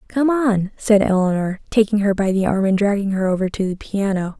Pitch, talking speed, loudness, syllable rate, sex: 200 Hz, 220 wpm, -18 LUFS, 5.4 syllables/s, female